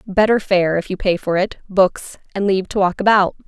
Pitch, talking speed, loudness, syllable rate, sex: 190 Hz, 225 wpm, -17 LUFS, 5.4 syllables/s, female